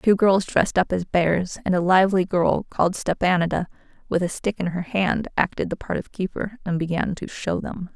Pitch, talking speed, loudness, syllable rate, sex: 185 Hz, 210 wpm, -23 LUFS, 5.3 syllables/s, female